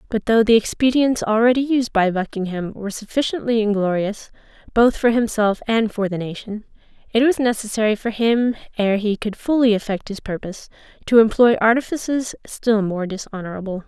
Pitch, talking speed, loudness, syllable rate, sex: 220 Hz, 155 wpm, -19 LUFS, 5.4 syllables/s, female